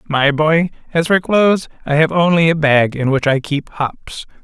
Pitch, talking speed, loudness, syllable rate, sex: 155 Hz, 205 wpm, -15 LUFS, 4.6 syllables/s, male